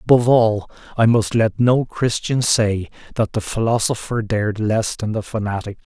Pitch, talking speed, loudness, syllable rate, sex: 110 Hz, 160 wpm, -19 LUFS, 4.9 syllables/s, male